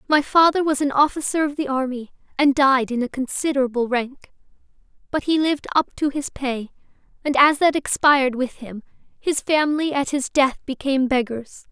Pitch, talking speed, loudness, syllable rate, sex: 275 Hz, 175 wpm, -20 LUFS, 5.2 syllables/s, female